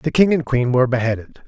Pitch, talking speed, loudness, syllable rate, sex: 130 Hz, 245 wpm, -18 LUFS, 6.3 syllables/s, male